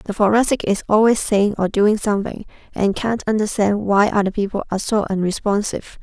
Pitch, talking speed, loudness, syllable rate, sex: 205 Hz, 170 wpm, -18 LUFS, 5.8 syllables/s, female